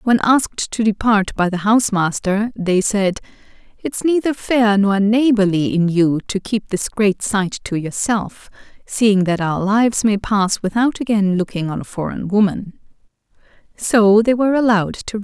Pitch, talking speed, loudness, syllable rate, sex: 210 Hz, 170 wpm, -17 LUFS, 4.7 syllables/s, female